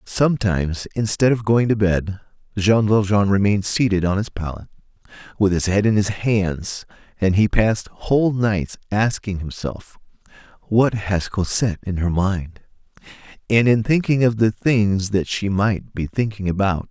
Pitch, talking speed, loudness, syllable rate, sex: 100 Hz, 155 wpm, -20 LUFS, 4.5 syllables/s, male